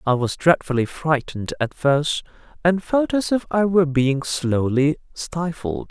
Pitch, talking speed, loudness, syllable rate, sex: 150 Hz, 150 wpm, -21 LUFS, 4.3 syllables/s, male